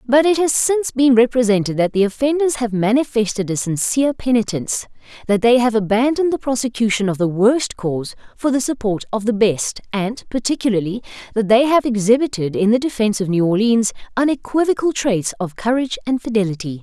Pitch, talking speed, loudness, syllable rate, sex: 230 Hz, 170 wpm, -18 LUFS, 5.9 syllables/s, female